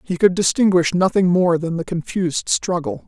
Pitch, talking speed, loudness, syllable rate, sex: 180 Hz, 175 wpm, -18 LUFS, 5.1 syllables/s, female